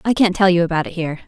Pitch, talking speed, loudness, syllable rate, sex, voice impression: 180 Hz, 330 wpm, -17 LUFS, 8.0 syllables/s, female, feminine, adult-like, tensed, powerful, slightly hard, clear, fluent, intellectual, slightly friendly, elegant, lively, slightly strict, slightly sharp